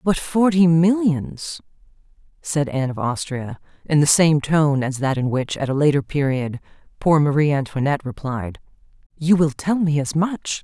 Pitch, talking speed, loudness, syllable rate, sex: 150 Hz, 165 wpm, -20 LUFS, 4.7 syllables/s, female